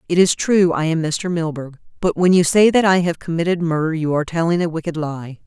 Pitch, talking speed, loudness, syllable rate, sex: 165 Hz, 240 wpm, -18 LUFS, 5.8 syllables/s, female